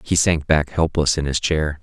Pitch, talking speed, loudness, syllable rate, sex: 75 Hz, 230 wpm, -19 LUFS, 4.6 syllables/s, male